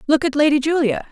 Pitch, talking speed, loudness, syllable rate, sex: 290 Hz, 215 wpm, -17 LUFS, 6.6 syllables/s, female